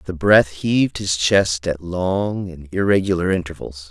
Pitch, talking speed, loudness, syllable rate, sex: 90 Hz, 155 wpm, -19 LUFS, 4.3 syllables/s, male